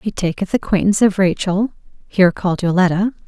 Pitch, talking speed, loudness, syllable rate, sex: 190 Hz, 145 wpm, -17 LUFS, 6.1 syllables/s, female